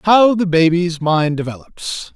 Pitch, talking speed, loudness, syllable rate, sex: 175 Hz, 140 wpm, -16 LUFS, 3.9 syllables/s, male